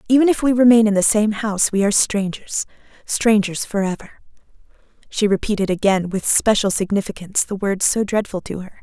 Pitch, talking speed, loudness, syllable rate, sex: 205 Hz, 165 wpm, -18 LUFS, 5.7 syllables/s, female